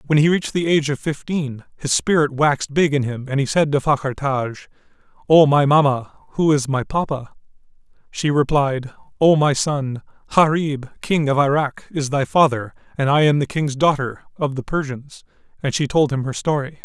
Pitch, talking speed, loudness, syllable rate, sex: 145 Hz, 190 wpm, -19 LUFS, 5.0 syllables/s, male